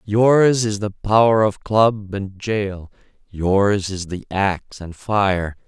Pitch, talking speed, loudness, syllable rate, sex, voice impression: 100 Hz, 150 wpm, -19 LUFS, 3.4 syllables/s, male, masculine, adult-like, tensed, clear, slightly muffled, slightly nasal, cool, intellectual, unique, lively, strict